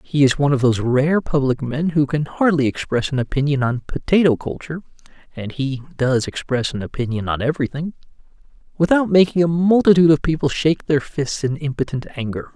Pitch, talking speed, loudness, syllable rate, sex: 145 Hz, 165 wpm, -19 LUFS, 5.9 syllables/s, male